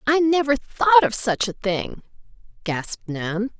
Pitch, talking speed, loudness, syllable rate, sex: 235 Hz, 150 wpm, -21 LUFS, 4.2 syllables/s, female